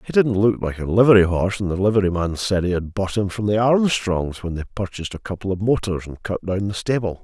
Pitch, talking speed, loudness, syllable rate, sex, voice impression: 100 Hz, 250 wpm, -20 LUFS, 6.1 syllables/s, male, very masculine, middle-aged, thick, slightly muffled, cool, slightly calm, wild